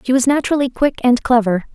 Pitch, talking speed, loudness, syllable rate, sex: 250 Hz, 205 wpm, -16 LUFS, 6.8 syllables/s, female